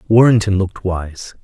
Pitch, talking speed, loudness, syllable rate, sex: 100 Hz, 125 wpm, -16 LUFS, 4.9 syllables/s, male